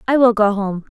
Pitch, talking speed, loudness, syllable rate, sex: 220 Hz, 250 wpm, -16 LUFS, 5.3 syllables/s, female